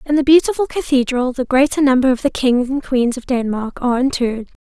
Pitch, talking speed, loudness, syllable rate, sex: 260 Hz, 205 wpm, -16 LUFS, 5.9 syllables/s, female